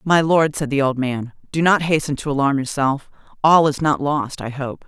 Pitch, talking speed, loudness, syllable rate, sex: 145 Hz, 220 wpm, -19 LUFS, 4.9 syllables/s, female